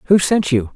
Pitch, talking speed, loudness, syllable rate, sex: 155 Hz, 240 wpm, -16 LUFS, 5.7 syllables/s, male